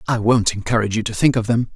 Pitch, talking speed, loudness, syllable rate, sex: 110 Hz, 275 wpm, -18 LUFS, 7.0 syllables/s, male